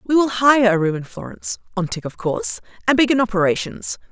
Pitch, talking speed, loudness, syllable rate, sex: 220 Hz, 205 wpm, -19 LUFS, 5.5 syllables/s, female